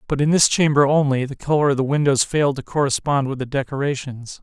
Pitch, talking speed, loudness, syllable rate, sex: 140 Hz, 215 wpm, -19 LUFS, 6.1 syllables/s, male